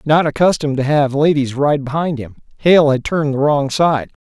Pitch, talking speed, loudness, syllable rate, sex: 145 Hz, 200 wpm, -15 LUFS, 5.2 syllables/s, male